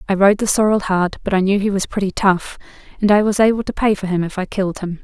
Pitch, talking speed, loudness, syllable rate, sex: 195 Hz, 285 wpm, -17 LUFS, 6.4 syllables/s, female